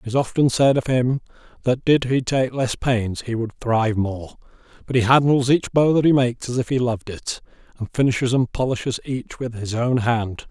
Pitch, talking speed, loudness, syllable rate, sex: 125 Hz, 215 wpm, -21 LUFS, 5.2 syllables/s, male